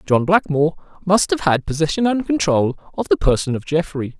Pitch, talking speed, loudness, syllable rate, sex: 165 Hz, 185 wpm, -18 LUFS, 5.5 syllables/s, male